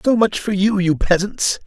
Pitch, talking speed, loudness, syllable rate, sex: 195 Hz, 215 wpm, -18 LUFS, 4.6 syllables/s, male